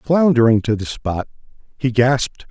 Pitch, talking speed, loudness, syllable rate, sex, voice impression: 125 Hz, 145 wpm, -17 LUFS, 4.6 syllables/s, male, masculine, slightly old, slightly thick, muffled, cool, sincere, slightly calm, elegant, kind